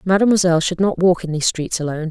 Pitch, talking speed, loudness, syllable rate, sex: 175 Hz, 230 wpm, -17 LUFS, 7.5 syllables/s, female